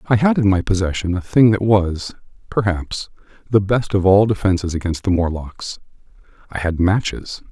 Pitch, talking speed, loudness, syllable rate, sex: 95 Hz, 160 wpm, -18 LUFS, 4.9 syllables/s, male